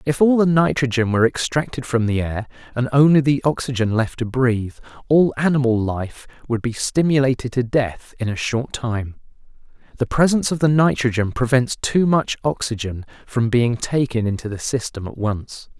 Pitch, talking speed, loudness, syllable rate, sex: 125 Hz, 170 wpm, -19 LUFS, 5.1 syllables/s, male